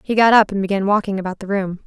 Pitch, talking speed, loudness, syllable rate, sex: 200 Hz, 290 wpm, -17 LUFS, 6.8 syllables/s, female